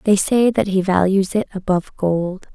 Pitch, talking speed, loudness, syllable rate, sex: 195 Hz, 190 wpm, -18 LUFS, 4.9 syllables/s, female